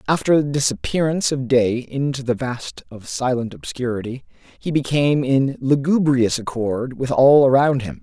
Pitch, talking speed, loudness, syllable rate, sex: 130 Hz, 150 wpm, -19 LUFS, 4.7 syllables/s, male